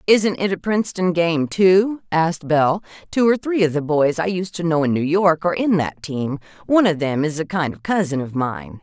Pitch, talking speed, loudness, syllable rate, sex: 170 Hz, 240 wpm, -19 LUFS, 5.2 syllables/s, female